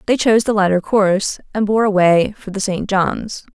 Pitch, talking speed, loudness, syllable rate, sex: 200 Hz, 205 wpm, -16 LUFS, 5.1 syllables/s, female